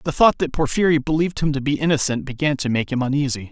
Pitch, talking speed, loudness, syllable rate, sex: 145 Hz, 240 wpm, -20 LUFS, 6.8 syllables/s, male